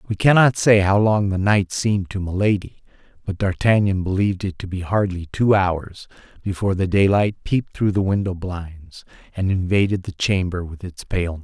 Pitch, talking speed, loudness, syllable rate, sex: 95 Hz, 180 wpm, -20 LUFS, 5.4 syllables/s, male